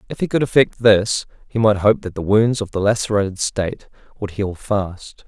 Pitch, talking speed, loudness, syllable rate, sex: 105 Hz, 205 wpm, -18 LUFS, 5.0 syllables/s, male